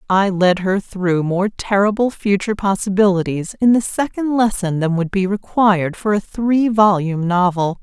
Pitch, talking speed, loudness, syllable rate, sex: 195 Hz, 160 wpm, -17 LUFS, 4.7 syllables/s, female